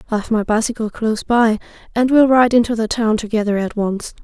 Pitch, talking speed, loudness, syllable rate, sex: 225 Hz, 200 wpm, -17 LUFS, 5.9 syllables/s, female